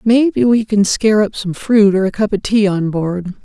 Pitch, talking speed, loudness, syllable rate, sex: 205 Hz, 245 wpm, -14 LUFS, 4.9 syllables/s, female